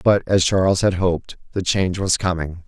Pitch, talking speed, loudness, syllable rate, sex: 90 Hz, 200 wpm, -19 LUFS, 5.5 syllables/s, male